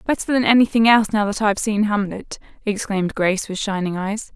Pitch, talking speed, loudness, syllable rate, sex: 210 Hz, 195 wpm, -19 LUFS, 6.1 syllables/s, female